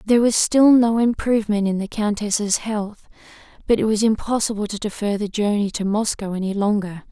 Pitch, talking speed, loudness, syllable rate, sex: 210 Hz, 175 wpm, -20 LUFS, 5.3 syllables/s, female